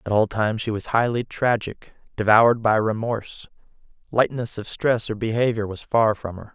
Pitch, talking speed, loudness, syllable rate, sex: 110 Hz, 175 wpm, -22 LUFS, 5.2 syllables/s, male